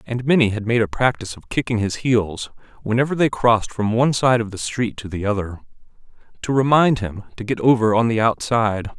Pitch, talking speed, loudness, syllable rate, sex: 115 Hz, 205 wpm, -19 LUFS, 5.7 syllables/s, male